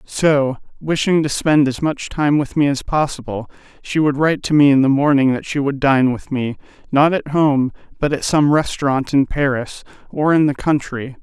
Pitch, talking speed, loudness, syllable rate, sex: 140 Hz, 205 wpm, -17 LUFS, 4.9 syllables/s, male